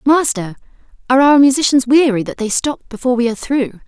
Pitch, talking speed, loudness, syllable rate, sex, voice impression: 255 Hz, 185 wpm, -14 LUFS, 6.3 syllables/s, female, feminine, slightly adult-like, fluent, slightly cute, friendly